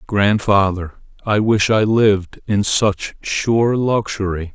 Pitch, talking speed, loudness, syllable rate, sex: 105 Hz, 120 wpm, -17 LUFS, 3.5 syllables/s, male